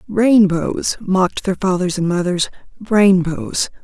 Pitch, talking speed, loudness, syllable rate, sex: 185 Hz, 95 wpm, -16 LUFS, 3.7 syllables/s, female